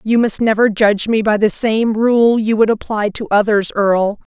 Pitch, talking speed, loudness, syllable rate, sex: 215 Hz, 205 wpm, -14 LUFS, 4.9 syllables/s, female